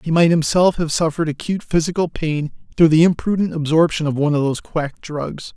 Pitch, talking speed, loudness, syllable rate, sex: 160 Hz, 195 wpm, -18 LUFS, 6.0 syllables/s, male